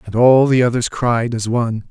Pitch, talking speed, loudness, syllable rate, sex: 120 Hz, 220 wpm, -15 LUFS, 5.2 syllables/s, male